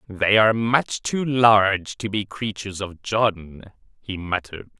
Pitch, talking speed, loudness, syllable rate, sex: 105 Hz, 150 wpm, -21 LUFS, 4.3 syllables/s, male